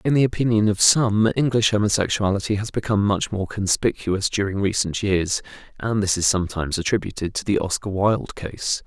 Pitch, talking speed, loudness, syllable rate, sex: 100 Hz, 170 wpm, -21 LUFS, 5.6 syllables/s, male